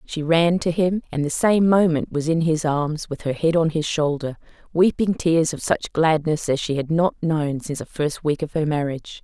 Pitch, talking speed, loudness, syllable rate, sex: 160 Hz, 225 wpm, -21 LUFS, 4.9 syllables/s, female